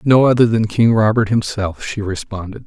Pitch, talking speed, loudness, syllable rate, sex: 110 Hz, 180 wpm, -16 LUFS, 5.1 syllables/s, male